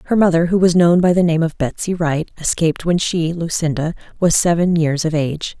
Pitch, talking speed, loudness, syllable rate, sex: 165 Hz, 215 wpm, -17 LUFS, 5.6 syllables/s, female